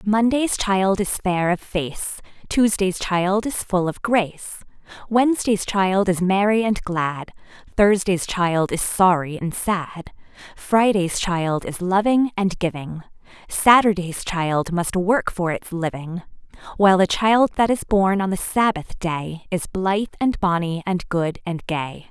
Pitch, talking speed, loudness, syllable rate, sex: 190 Hz, 150 wpm, -20 LUFS, 4.0 syllables/s, female